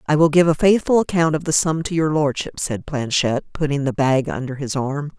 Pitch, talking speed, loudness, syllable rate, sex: 150 Hz, 230 wpm, -19 LUFS, 5.3 syllables/s, female